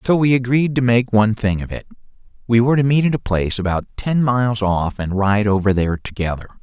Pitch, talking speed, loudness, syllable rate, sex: 110 Hz, 225 wpm, -18 LUFS, 6.2 syllables/s, male